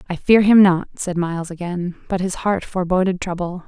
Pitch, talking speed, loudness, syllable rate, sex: 180 Hz, 195 wpm, -19 LUFS, 5.5 syllables/s, female